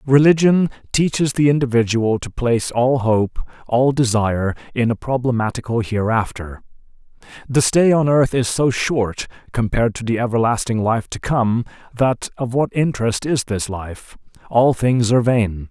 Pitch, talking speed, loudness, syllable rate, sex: 120 Hz, 150 wpm, -18 LUFS, 4.7 syllables/s, male